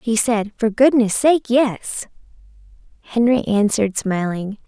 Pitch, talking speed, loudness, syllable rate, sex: 225 Hz, 115 wpm, -18 LUFS, 4.1 syllables/s, female